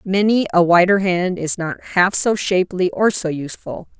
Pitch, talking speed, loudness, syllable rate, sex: 185 Hz, 180 wpm, -17 LUFS, 4.8 syllables/s, female